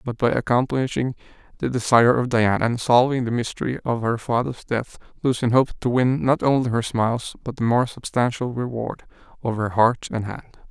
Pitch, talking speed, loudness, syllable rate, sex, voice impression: 120 Hz, 185 wpm, -22 LUFS, 5.5 syllables/s, male, masculine, adult-like, relaxed, weak, dark, muffled, raspy, slightly intellectual, slightly sincere, kind, modest